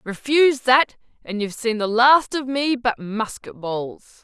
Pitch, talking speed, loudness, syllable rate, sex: 240 Hz, 170 wpm, -20 LUFS, 4.2 syllables/s, female